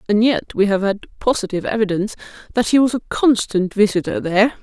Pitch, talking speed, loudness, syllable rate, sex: 215 Hz, 180 wpm, -18 LUFS, 6.1 syllables/s, female